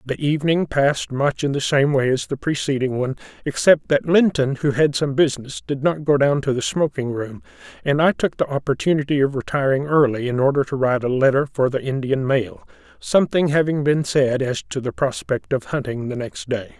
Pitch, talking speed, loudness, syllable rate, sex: 140 Hz, 205 wpm, -20 LUFS, 5.5 syllables/s, male